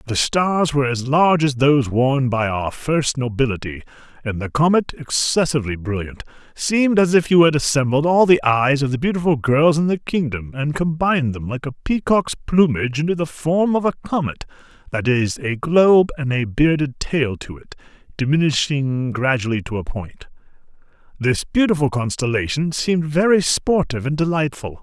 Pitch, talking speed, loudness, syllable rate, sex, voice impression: 145 Hz, 165 wpm, -18 LUFS, 5.2 syllables/s, male, masculine, middle-aged, powerful, slightly bright, muffled, raspy, mature, friendly, wild, lively, slightly strict, intense